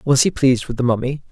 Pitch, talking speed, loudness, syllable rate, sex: 130 Hz, 275 wpm, -18 LUFS, 6.6 syllables/s, male